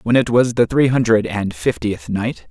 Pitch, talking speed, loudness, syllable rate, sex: 115 Hz, 215 wpm, -17 LUFS, 4.6 syllables/s, male